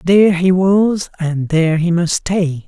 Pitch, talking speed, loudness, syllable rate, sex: 175 Hz, 180 wpm, -15 LUFS, 4.1 syllables/s, male